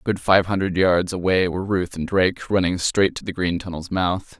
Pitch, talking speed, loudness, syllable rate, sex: 90 Hz, 230 wpm, -21 LUFS, 5.4 syllables/s, male